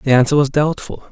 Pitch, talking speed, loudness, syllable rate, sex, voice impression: 140 Hz, 215 wpm, -15 LUFS, 5.7 syllables/s, male, very masculine, slightly young, slightly adult-like, thick, tensed, powerful, slightly bright, slightly hard, clear, fluent, cool, intellectual, very refreshing, sincere, calm, friendly, reassuring, slightly unique, slightly elegant, wild, slightly sweet, lively, kind, slightly intense